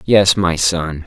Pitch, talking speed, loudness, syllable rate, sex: 90 Hz, 170 wpm, -15 LUFS, 3.1 syllables/s, male